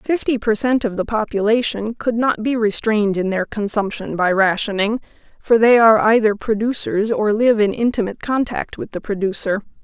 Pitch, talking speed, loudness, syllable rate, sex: 215 Hz, 170 wpm, -18 LUFS, 5.2 syllables/s, female